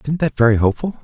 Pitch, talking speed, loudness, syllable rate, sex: 130 Hz, 230 wpm, -16 LUFS, 7.5 syllables/s, male